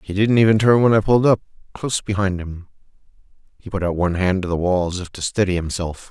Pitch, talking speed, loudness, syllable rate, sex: 95 Hz, 235 wpm, -19 LUFS, 6.5 syllables/s, male